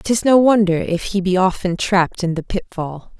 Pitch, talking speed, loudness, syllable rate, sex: 190 Hz, 205 wpm, -17 LUFS, 4.9 syllables/s, female